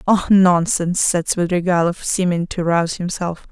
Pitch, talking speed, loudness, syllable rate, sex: 175 Hz, 135 wpm, -17 LUFS, 4.9 syllables/s, female